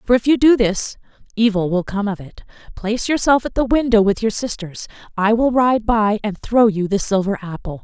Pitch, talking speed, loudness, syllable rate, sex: 215 Hz, 215 wpm, -18 LUFS, 5.2 syllables/s, female